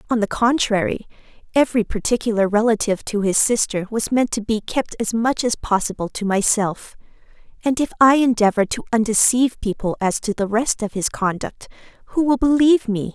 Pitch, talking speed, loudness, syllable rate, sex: 225 Hz, 175 wpm, -19 LUFS, 5.5 syllables/s, female